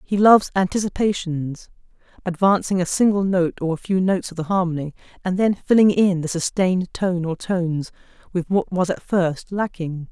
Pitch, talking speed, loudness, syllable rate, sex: 180 Hz, 165 wpm, -20 LUFS, 5.1 syllables/s, female